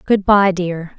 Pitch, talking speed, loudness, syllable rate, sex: 185 Hz, 185 wpm, -15 LUFS, 3.4 syllables/s, female